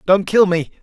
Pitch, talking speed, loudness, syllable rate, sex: 190 Hz, 220 wpm, -15 LUFS, 4.8 syllables/s, male